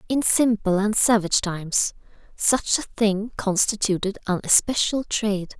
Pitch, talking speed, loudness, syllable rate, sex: 210 Hz, 130 wpm, -21 LUFS, 4.6 syllables/s, female